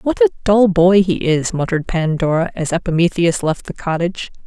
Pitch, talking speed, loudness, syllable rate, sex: 170 Hz, 175 wpm, -16 LUFS, 5.4 syllables/s, female